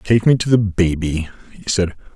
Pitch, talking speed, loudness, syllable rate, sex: 95 Hz, 195 wpm, -18 LUFS, 5.1 syllables/s, male